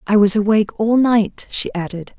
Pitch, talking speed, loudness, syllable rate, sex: 220 Hz, 190 wpm, -17 LUFS, 5.0 syllables/s, female